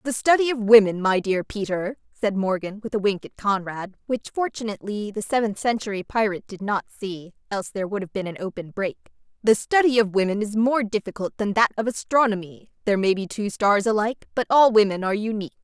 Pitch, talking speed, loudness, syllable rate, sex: 210 Hz, 200 wpm, -23 LUFS, 6.2 syllables/s, female